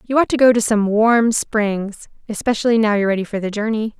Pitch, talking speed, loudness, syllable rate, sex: 220 Hz, 225 wpm, -17 LUFS, 5.7 syllables/s, female